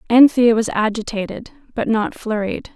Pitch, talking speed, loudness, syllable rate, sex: 225 Hz, 130 wpm, -18 LUFS, 4.7 syllables/s, female